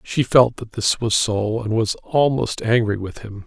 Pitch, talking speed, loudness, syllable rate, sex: 110 Hz, 210 wpm, -19 LUFS, 4.4 syllables/s, male